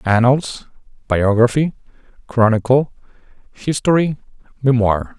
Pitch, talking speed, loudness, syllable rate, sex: 125 Hz, 60 wpm, -17 LUFS, 4.1 syllables/s, male